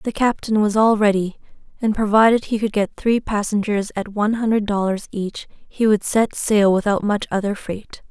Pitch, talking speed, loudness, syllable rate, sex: 210 Hz, 185 wpm, -19 LUFS, 4.9 syllables/s, female